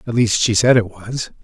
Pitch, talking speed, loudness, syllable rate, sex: 110 Hz, 250 wpm, -16 LUFS, 5.0 syllables/s, male